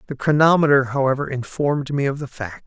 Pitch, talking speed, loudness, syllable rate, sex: 135 Hz, 180 wpm, -19 LUFS, 6.1 syllables/s, male